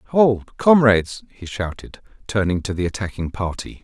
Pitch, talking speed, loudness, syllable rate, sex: 105 Hz, 140 wpm, -20 LUFS, 4.9 syllables/s, male